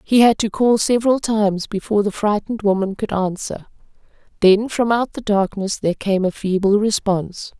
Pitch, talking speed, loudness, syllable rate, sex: 210 Hz, 175 wpm, -18 LUFS, 5.4 syllables/s, female